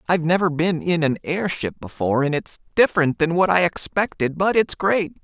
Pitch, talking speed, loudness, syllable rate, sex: 165 Hz, 195 wpm, -20 LUFS, 5.4 syllables/s, male